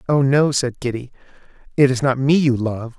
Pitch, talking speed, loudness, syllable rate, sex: 130 Hz, 200 wpm, -18 LUFS, 5.1 syllables/s, male